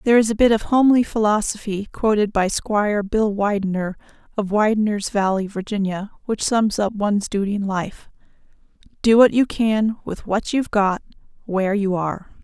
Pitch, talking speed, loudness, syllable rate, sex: 210 Hz, 165 wpm, -20 LUFS, 5.3 syllables/s, female